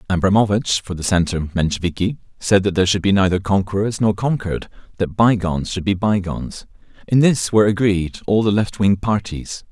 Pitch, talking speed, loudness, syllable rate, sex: 100 Hz, 165 wpm, -18 LUFS, 5.7 syllables/s, male